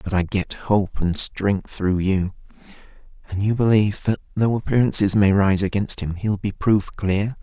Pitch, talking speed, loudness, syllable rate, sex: 100 Hz, 185 wpm, -21 LUFS, 4.9 syllables/s, male